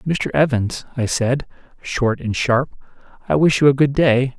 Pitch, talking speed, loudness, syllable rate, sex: 130 Hz, 180 wpm, -18 LUFS, 4.5 syllables/s, male